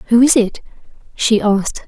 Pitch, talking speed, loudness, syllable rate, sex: 220 Hz, 160 wpm, -15 LUFS, 5.5 syllables/s, female